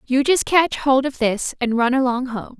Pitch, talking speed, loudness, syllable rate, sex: 260 Hz, 230 wpm, -19 LUFS, 4.6 syllables/s, female